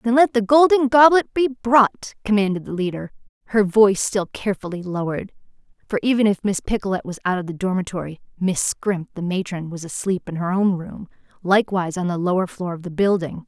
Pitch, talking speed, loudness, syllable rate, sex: 200 Hz, 190 wpm, -20 LUFS, 5.8 syllables/s, female